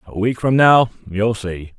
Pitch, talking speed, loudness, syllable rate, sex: 110 Hz, 200 wpm, -16 LUFS, 4.0 syllables/s, male